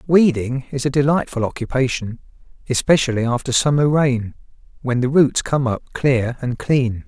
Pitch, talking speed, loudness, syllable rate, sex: 130 Hz, 145 wpm, -19 LUFS, 4.8 syllables/s, male